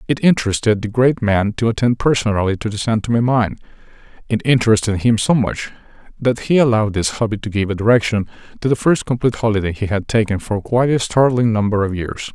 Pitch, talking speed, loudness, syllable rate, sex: 110 Hz, 205 wpm, -17 LUFS, 6.1 syllables/s, male